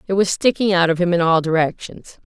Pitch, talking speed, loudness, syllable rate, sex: 180 Hz, 240 wpm, -17 LUFS, 5.9 syllables/s, female